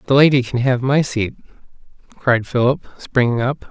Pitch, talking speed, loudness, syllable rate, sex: 125 Hz, 160 wpm, -17 LUFS, 5.1 syllables/s, male